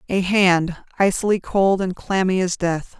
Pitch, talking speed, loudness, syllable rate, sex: 185 Hz, 160 wpm, -19 LUFS, 4.1 syllables/s, female